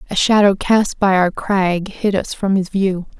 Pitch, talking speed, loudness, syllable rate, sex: 190 Hz, 205 wpm, -16 LUFS, 4.2 syllables/s, female